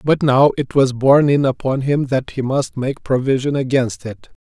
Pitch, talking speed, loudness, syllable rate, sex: 135 Hz, 205 wpm, -17 LUFS, 4.8 syllables/s, male